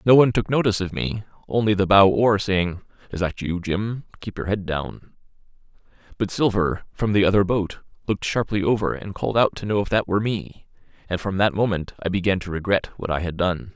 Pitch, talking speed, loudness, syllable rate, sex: 100 Hz, 215 wpm, -22 LUFS, 5.8 syllables/s, male